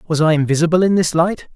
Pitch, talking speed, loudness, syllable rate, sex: 165 Hz, 230 wpm, -15 LUFS, 6.0 syllables/s, male